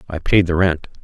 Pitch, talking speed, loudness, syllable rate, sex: 85 Hz, 235 wpm, -17 LUFS, 5.4 syllables/s, male